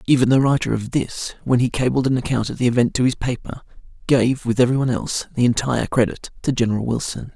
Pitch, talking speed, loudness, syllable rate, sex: 125 Hz, 220 wpm, -20 LUFS, 6.6 syllables/s, male